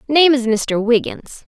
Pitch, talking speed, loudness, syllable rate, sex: 250 Hz, 155 wpm, -15 LUFS, 3.9 syllables/s, female